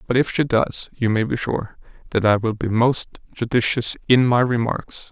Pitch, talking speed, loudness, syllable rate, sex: 120 Hz, 200 wpm, -20 LUFS, 4.6 syllables/s, male